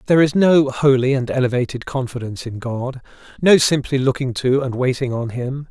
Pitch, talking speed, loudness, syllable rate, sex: 130 Hz, 180 wpm, -18 LUFS, 5.5 syllables/s, male